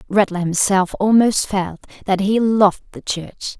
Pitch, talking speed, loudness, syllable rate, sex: 200 Hz, 150 wpm, -17 LUFS, 4.4 syllables/s, female